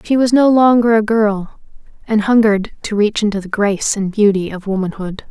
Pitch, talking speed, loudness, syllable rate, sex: 210 Hz, 190 wpm, -15 LUFS, 5.3 syllables/s, female